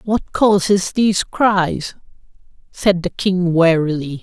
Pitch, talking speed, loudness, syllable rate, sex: 185 Hz, 115 wpm, -16 LUFS, 3.5 syllables/s, female